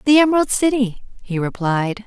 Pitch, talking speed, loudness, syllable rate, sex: 230 Hz, 145 wpm, -18 LUFS, 5.1 syllables/s, female